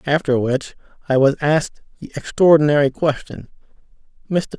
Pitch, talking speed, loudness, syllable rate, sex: 145 Hz, 120 wpm, -17 LUFS, 3.8 syllables/s, male